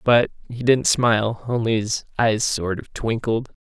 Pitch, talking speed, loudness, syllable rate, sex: 115 Hz, 165 wpm, -21 LUFS, 4.2 syllables/s, male